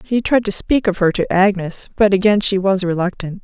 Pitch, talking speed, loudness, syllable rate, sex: 195 Hz, 225 wpm, -16 LUFS, 5.1 syllables/s, female